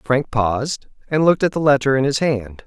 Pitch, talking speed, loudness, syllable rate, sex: 135 Hz, 225 wpm, -18 LUFS, 5.5 syllables/s, male